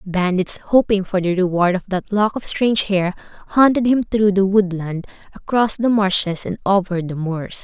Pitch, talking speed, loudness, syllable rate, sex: 195 Hz, 180 wpm, -18 LUFS, 4.7 syllables/s, female